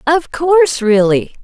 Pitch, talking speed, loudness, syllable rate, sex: 275 Hz, 125 wpm, -13 LUFS, 3.8 syllables/s, female